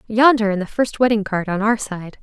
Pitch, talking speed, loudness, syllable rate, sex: 215 Hz, 245 wpm, -18 LUFS, 5.4 syllables/s, female